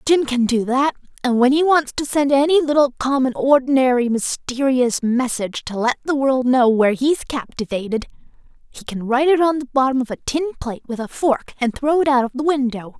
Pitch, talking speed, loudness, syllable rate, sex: 265 Hz, 210 wpm, -18 LUFS, 5.6 syllables/s, female